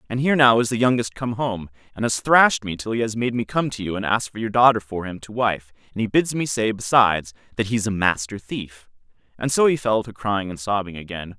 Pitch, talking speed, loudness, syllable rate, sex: 110 Hz, 260 wpm, -21 LUFS, 5.8 syllables/s, male